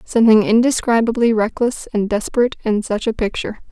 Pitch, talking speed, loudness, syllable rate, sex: 225 Hz, 145 wpm, -17 LUFS, 6.1 syllables/s, female